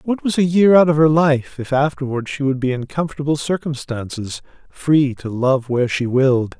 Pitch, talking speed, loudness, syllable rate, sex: 140 Hz, 200 wpm, -18 LUFS, 5.1 syllables/s, male